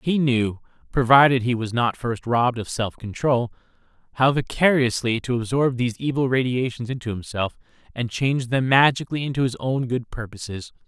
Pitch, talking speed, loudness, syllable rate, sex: 125 Hz, 150 wpm, -22 LUFS, 5.4 syllables/s, male